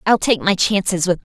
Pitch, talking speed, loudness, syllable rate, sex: 195 Hz, 220 wpm, -17 LUFS, 5.6 syllables/s, female